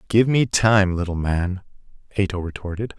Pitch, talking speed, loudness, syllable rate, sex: 100 Hz, 140 wpm, -21 LUFS, 4.9 syllables/s, male